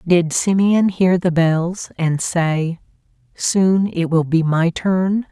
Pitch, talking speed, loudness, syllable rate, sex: 175 Hz, 145 wpm, -17 LUFS, 3.1 syllables/s, female